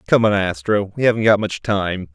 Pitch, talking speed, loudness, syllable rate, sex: 100 Hz, 225 wpm, -18 LUFS, 5.2 syllables/s, male